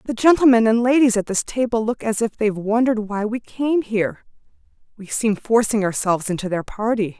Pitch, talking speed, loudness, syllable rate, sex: 220 Hz, 185 wpm, -19 LUFS, 5.6 syllables/s, female